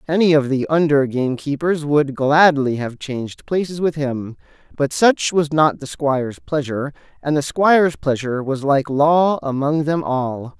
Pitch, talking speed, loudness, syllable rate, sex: 145 Hz, 165 wpm, -18 LUFS, 4.6 syllables/s, male